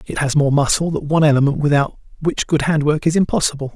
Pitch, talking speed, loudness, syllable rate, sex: 150 Hz, 225 wpm, -17 LUFS, 6.6 syllables/s, male